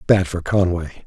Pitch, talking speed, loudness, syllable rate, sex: 90 Hz, 170 wpm, -20 LUFS, 5.3 syllables/s, male